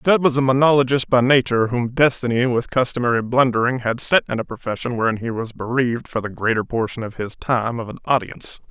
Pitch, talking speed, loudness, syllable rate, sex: 120 Hz, 205 wpm, -19 LUFS, 6.1 syllables/s, male